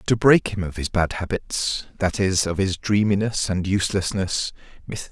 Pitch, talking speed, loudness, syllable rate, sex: 95 Hz, 150 wpm, -22 LUFS, 4.7 syllables/s, male